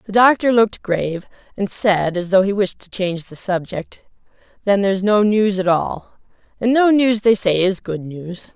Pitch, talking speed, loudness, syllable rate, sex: 200 Hz, 195 wpm, -18 LUFS, 4.9 syllables/s, female